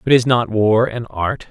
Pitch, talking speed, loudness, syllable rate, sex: 115 Hz, 240 wpm, -17 LUFS, 4.4 syllables/s, male